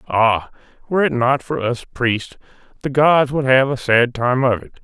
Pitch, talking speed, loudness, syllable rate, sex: 130 Hz, 200 wpm, -17 LUFS, 4.5 syllables/s, male